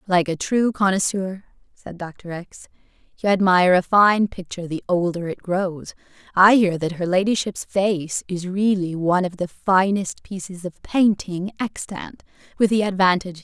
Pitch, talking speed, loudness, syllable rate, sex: 185 Hz, 160 wpm, -20 LUFS, 4.6 syllables/s, female